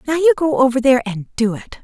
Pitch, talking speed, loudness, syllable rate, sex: 255 Hz, 260 wpm, -16 LUFS, 6.2 syllables/s, female